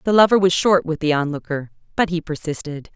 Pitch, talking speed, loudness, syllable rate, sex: 165 Hz, 205 wpm, -19 LUFS, 5.8 syllables/s, female